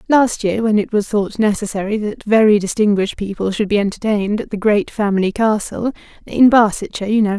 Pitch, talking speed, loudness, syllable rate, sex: 210 Hz, 180 wpm, -16 LUFS, 5.8 syllables/s, female